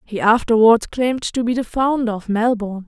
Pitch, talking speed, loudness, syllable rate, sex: 230 Hz, 190 wpm, -17 LUFS, 5.4 syllables/s, female